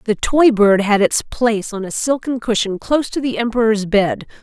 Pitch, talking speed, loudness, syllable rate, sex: 220 Hz, 205 wpm, -16 LUFS, 5.1 syllables/s, female